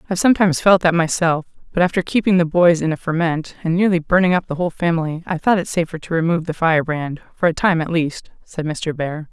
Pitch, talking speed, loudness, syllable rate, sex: 170 Hz, 230 wpm, -18 LUFS, 6.4 syllables/s, female